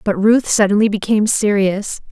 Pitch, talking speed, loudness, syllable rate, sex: 205 Hz, 140 wpm, -15 LUFS, 5.1 syllables/s, female